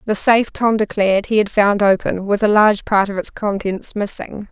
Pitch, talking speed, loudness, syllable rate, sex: 205 Hz, 210 wpm, -16 LUFS, 5.3 syllables/s, female